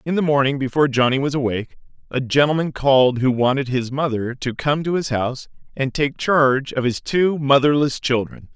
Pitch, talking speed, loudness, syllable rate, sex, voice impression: 135 Hz, 190 wpm, -19 LUFS, 5.5 syllables/s, male, masculine, adult-like